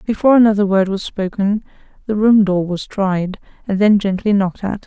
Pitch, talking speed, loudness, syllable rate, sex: 200 Hz, 185 wpm, -16 LUFS, 5.4 syllables/s, female